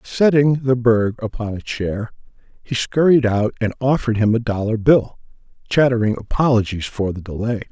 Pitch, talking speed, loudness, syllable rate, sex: 115 Hz, 155 wpm, -18 LUFS, 5.1 syllables/s, male